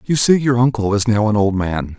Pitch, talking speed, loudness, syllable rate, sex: 115 Hz, 270 wpm, -16 LUFS, 5.3 syllables/s, male